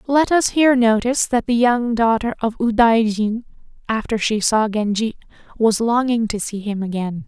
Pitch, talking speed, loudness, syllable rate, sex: 225 Hz, 165 wpm, -18 LUFS, 4.8 syllables/s, female